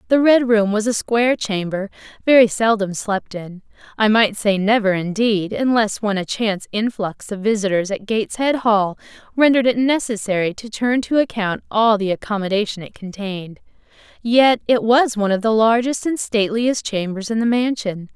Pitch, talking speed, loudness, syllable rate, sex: 215 Hz, 170 wpm, -18 LUFS, 5.1 syllables/s, female